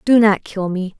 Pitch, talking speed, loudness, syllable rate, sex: 200 Hz, 240 wpm, -17 LUFS, 4.6 syllables/s, female